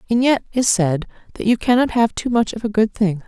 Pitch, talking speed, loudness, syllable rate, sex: 220 Hz, 255 wpm, -18 LUFS, 5.6 syllables/s, female